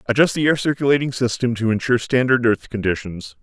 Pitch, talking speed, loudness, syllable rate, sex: 120 Hz, 175 wpm, -19 LUFS, 6.2 syllables/s, male